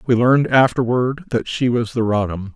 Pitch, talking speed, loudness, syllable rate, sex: 120 Hz, 190 wpm, -18 LUFS, 5.1 syllables/s, male